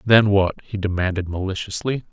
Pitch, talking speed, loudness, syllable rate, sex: 100 Hz, 140 wpm, -21 LUFS, 5.3 syllables/s, male